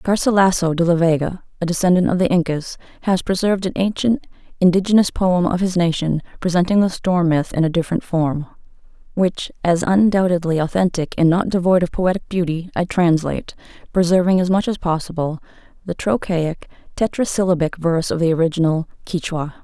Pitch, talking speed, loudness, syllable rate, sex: 175 Hz, 155 wpm, -18 LUFS, 5.7 syllables/s, female